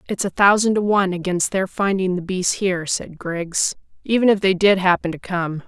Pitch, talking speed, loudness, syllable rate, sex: 185 Hz, 210 wpm, -19 LUFS, 5.2 syllables/s, female